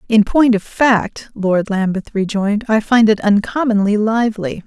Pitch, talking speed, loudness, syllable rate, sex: 215 Hz, 155 wpm, -15 LUFS, 4.5 syllables/s, female